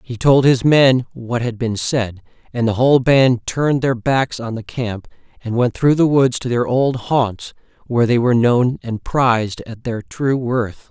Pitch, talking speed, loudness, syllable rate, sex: 125 Hz, 205 wpm, -17 LUFS, 4.3 syllables/s, male